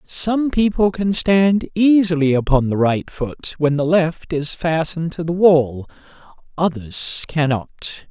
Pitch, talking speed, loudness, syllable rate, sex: 165 Hz, 140 wpm, -18 LUFS, 3.8 syllables/s, male